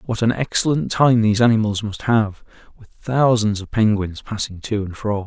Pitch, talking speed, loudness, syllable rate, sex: 110 Hz, 180 wpm, -19 LUFS, 5.0 syllables/s, male